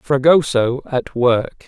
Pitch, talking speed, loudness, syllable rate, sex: 135 Hz, 105 wpm, -16 LUFS, 3.1 syllables/s, male